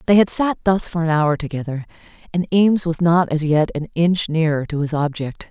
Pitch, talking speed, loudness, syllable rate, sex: 165 Hz, 220 wpm, -19 LUFS, 5.3 syllables/s, female